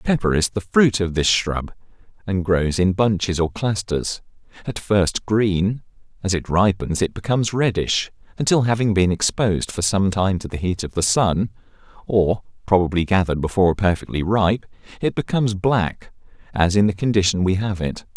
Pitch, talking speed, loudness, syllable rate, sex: 100 Hz, 170 wpm, -20 LUFS, 4.7 syllables/s, male